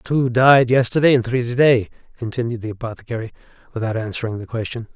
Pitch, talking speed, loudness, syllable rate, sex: 120 Hz, 170 wpm, -19 LUFS, 6.3 syllables/s, male